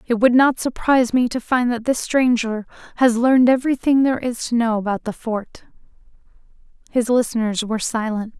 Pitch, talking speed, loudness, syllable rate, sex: 240 Hz, 170 wpm, -19 LUFS, 5.6 syllables/s, female